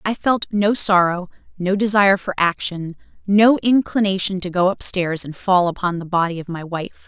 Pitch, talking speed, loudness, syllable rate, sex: 190 Hz, 180 wpm, -18 LUFS, 5.0 syllables/s, female